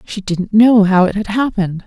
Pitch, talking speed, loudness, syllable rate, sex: 205 Hz, 225 wpm, -14 LUFS, 5.1 syllables/s, female